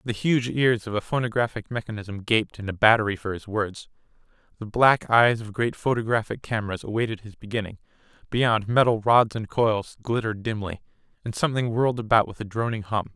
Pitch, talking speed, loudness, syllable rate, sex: 110 Hz, 180 wpm, -24 LUFS, 5.6 syllables/s, male